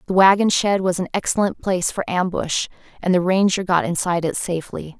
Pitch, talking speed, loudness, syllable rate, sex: 185 Hz, 190 wpm, -19 LUFS, 5.8 syllables/s, female